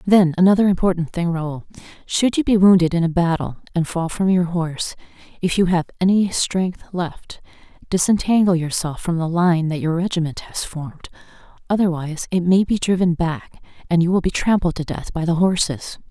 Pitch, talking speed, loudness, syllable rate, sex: 175 Hz, 185 wpm, -19 LUFS, 5.4 syllables/s, female